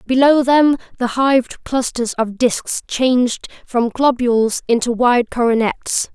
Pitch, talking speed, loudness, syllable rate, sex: 245 Hz, 125 wpm, -16 LUFS, 4.1 syllables/s, female